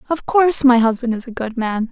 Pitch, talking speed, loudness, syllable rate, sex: 250 Hz, 250 wpm, -16 LUFS, 5.8 syllables/s, female